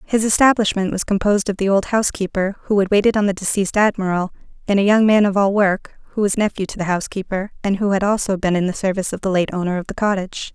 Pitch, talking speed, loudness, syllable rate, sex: 195 Hz, 245 wpm, -18 LUFS, 6.8 syllables/s, female